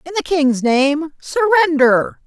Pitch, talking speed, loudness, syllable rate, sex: 310 Hz, 105 wpm, -15 LUFS, 3.5 syllables/s, female